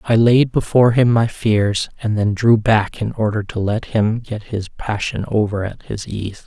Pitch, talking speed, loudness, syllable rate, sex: 110 Hz, 205 wpm, -18 LUFS, 4.4 syllables/s, male